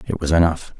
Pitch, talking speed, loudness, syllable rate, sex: 80 Hz, 225 wpm, -19 LUFS, 6.6 syllables/s, male